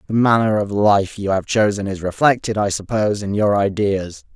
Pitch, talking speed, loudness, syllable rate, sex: 100 Hz, 195 wpm, -18 LUFS, 5.1 syllables/s, male